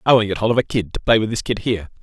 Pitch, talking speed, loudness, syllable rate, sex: 110 Hz, 415 wpm, -19 LUFS, 8.2 syllables/s, male